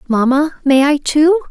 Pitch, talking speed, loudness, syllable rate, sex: 295 Hz, 160 wpm, -13 LUFS, 4.4 syllables/s, female